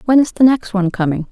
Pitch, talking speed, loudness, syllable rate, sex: 210 Hz, 275 wpm, -15 LUFS, 6.8 syllables/s, female